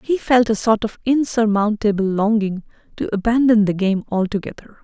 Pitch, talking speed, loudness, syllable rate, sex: 215 Hz, 150 wpm, -18 LUFS, 5.2 syllables/s, female